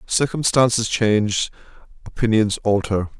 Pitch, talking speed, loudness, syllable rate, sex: 110 Hz, 75 wpm, -19 LUFS, 4.5 syllables/s, male